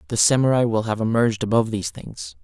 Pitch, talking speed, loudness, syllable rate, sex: 115 Hz, 195 wpm, -20 LUFS, 6.9 syllables/s, male